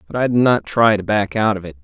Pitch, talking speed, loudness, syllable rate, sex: 100 Hz, 325 wpm, -17 LUFS, 6.2 syllables/s, male